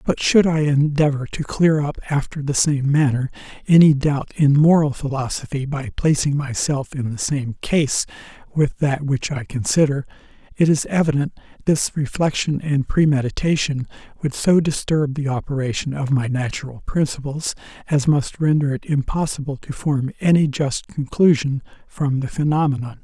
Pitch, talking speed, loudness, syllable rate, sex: 145 Hz, 150 wpm, -20 LUFS, 4.8 syllables/s, male